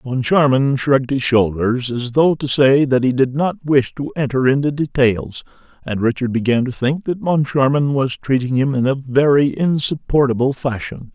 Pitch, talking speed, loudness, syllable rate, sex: 135 Hz, 170 wpm, -17 LUFS, 4.7 syllables/s, male